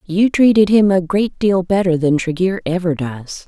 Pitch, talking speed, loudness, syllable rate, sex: 185 Hz, 190 wpm, -15 LUFS, 4.6 syllables/s, female